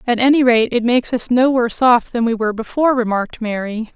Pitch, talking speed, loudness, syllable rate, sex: 240 Hz, 230 wpm, -16 LUFS, 6.3 syllables/s, female